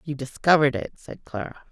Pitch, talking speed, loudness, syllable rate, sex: 140 Hz, 175 wpm, -23 LUFS, 5.8 syllables/s, female